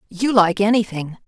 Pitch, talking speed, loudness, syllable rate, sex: 200 Hz, 140 wpm, -18 LUFS, 4.9 syllables/s, female